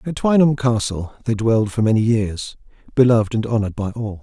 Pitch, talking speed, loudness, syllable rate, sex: 115 Hz, 185 wpm, -18 LUFS, 5.8 syllables/s, male